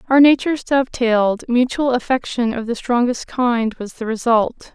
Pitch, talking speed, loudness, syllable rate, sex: 245 Hz, 125 wpm, -18 LUFS, 4.9 syllables/s, female